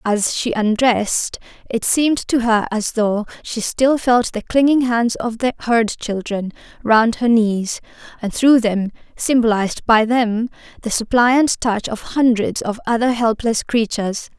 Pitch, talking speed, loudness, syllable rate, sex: 230 Hz, 155 wpm, -17 LUFS, 4.2 syllables/s, female